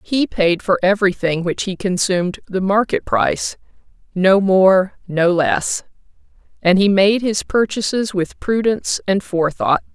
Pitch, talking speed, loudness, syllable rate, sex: 195 Hz, 125 wpm, -17 LUFS, 4.4 syllables/s, female